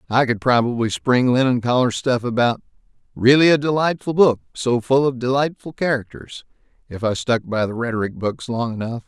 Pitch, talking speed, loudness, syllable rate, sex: 125 Hz, 170 wpm, -19 LUFS, 5.3 syllables/s, male